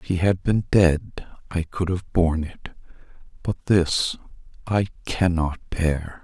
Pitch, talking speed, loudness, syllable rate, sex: 90 Hz, 145 wpm, -23 LUFS, 3.8 syllables/s, male